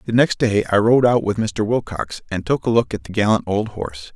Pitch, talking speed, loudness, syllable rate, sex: 110 Hz, 260 wpm, -19 LUFS, 5.4 syllables/s, male